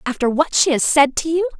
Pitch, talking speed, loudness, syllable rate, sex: 280 Hz, 265 wpm, -16 LUFS, 5.8 syllables/s, female